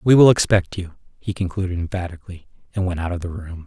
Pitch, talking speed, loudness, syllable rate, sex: 90 Hz, 215 wpm, -21 LUFS, 6.4 syllables/s, male